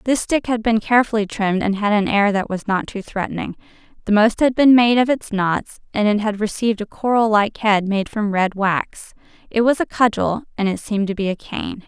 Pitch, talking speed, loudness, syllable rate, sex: 215 Hz, 230 wpm, -18 LUFS, 5.4 syllables/s, female